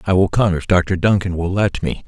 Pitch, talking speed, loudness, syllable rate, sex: 95 Hz, 260 wpm, -17 LUFS, 5.2 syllables/s, male